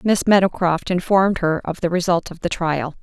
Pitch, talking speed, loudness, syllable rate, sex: 175 Hz, 200 wpm, -19 LUFS, 5.2 syllables/s, female